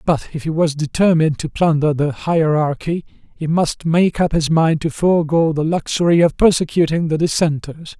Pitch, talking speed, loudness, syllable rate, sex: 160 Hz, 175 wpm, -17 LUFS, 5.1 syllables/s, male